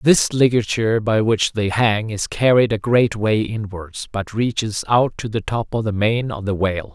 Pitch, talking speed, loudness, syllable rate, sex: 110 Hz, 205 wpm, -19 LUFS, 4.5 syllables/s, male